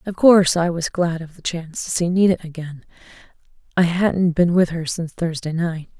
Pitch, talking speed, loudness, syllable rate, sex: 170 Hz, 190 wpm, -19 LUFS, 5.4 syllables/s, female